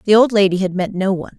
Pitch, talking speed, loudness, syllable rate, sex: 195 Hz, 305 wpm, -16 LUFS, 7.2 syllables/s, female